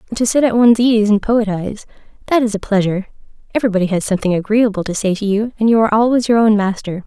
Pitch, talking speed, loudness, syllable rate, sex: 215 Hz, 210 wpm, -15 LUFS, 7.2 syllables/s, female